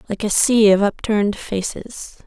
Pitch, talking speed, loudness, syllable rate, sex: 210 Hz, 160 wpm, -17 LUFS, 4.5 syllables/s, female